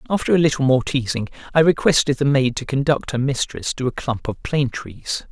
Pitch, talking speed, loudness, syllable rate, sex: 135 Hz, 215 wpm, -20 LUFS, 5.5 syllables/s, male